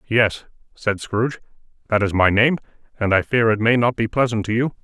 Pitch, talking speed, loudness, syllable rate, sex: 110 Hz, 210 wpm, -19 LUFS, 5.6 syllables/s, male